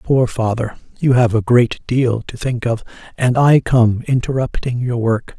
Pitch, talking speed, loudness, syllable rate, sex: 120 Hz, 180 wpm, -17 LUFS, 4.3 syllables/s, male